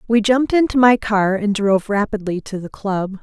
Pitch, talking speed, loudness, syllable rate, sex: 210 Hz, 205 wpm, -17 LUFS, 5.2 syllables/s, female